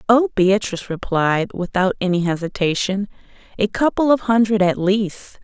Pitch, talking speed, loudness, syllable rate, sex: 200 Hz, 130 wpm, -19 LUFS, 4.8 syllables/s, female